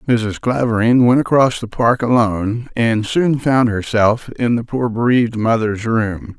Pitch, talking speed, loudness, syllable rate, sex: 115 Hz, 160 wpm, -16 LUFS, 4.3 syllables/s, male